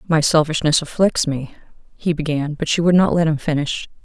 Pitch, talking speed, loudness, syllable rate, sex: 155 Hz, 195 wpm, -18 LUFS, 5.3 syllables/s, female